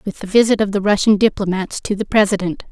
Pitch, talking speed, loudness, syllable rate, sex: 200 Hz, 220 wpm, -16 LUFS, 6.2 syllables/s, female